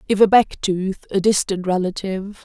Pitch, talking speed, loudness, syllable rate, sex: 195 Hz, 170 wpm, -19 LUFS, 5.1 syllables/s, female